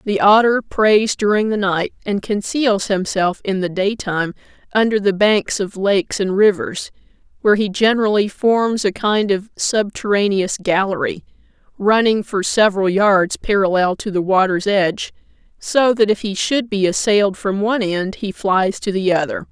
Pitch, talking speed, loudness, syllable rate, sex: 200 Hz, 160 wpm, -17 LUFS, 4.7 syllables/s, female